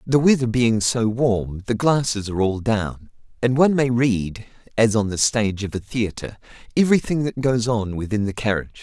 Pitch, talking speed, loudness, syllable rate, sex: 115 Hz, 190 wpm, -21 LUFS, 5.3 syllables/s, male